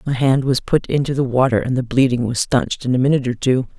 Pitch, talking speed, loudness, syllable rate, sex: 125 Hz, 270 wpm, -18 LUFS, 6.4 syllables/s, female